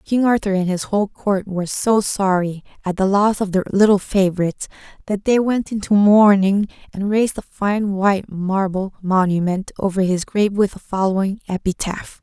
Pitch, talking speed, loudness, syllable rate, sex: 195 Hz, 170 wpm, -18 LUFS, 5.1 syllables/s, female